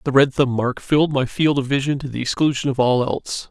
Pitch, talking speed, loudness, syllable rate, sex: 135 Hz, 255 wpm, -19 LUFS, 5.9 syllables/s, male